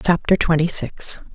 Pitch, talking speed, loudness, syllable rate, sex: 170 Hz, 135 wpm, -19 LUFS, 4.4 syllables/s, female